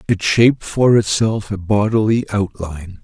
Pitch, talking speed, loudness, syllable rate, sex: 105 Hz, 140 wpm, -16 LUFS, 4.6 syllables/s, male